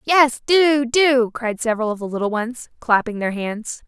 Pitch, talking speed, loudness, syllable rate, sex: 240 Hz, 185 wpm, -19 LUFS, 4.5 syllables/s, female